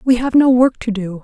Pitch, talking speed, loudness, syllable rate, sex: 235 Hz, 290 wpm, -14 LUFS, 5.3 syllables/s, female